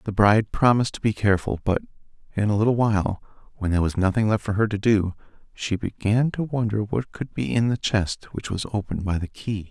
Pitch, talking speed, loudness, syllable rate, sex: 105 Hz, 225 wpm, -23 LUFS, 6.1 syllables/s, male